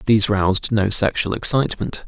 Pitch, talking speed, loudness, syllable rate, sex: 105 Hz, 145 wpm, -17 LUFS, 5.8 syllables/s, male